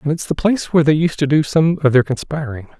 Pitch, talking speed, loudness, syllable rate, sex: 150 Hz, 280 wpm, -16 LUFS, 6.6 syllables/s, male